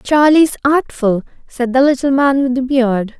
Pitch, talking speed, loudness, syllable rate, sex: 265 Hz, 170 wpm, -14 LUFS, 4.2 syllables/s, female